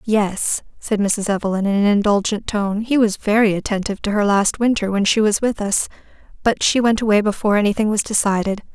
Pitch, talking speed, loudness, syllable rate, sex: 210 Hz, 190 wpm, -18 LUFS, 5.7 syllables/s, female